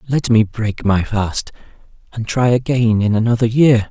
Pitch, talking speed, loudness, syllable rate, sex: 115 Hz, 170 wpm, -16 LUFS, 4.5 syllables/s, male